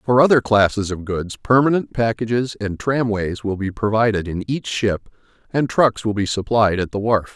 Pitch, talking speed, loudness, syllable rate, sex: 110 Hz, 190 wpm, -19 LUFS, 4.9 syllables/s, male